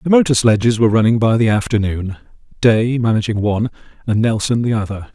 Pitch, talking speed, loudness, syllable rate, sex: 110 Hz, 175 wpm, -16 LUFS, 6.1 syllables/s, male